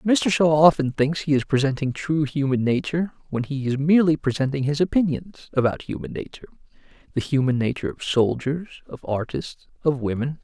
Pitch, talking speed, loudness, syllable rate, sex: 145 Hz, 160 wpm, -22 LUFS, 5.7 syllables/s, male